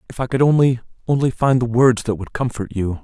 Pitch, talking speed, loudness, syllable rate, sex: 120 Hz, 235 wpm, -18 LUFS, 5.9 syllables/s, male